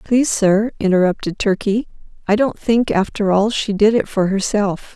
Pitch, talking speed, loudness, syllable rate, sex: 205 Hz, 170 wpm, -17 LUFS, 4.8 syllables/s, female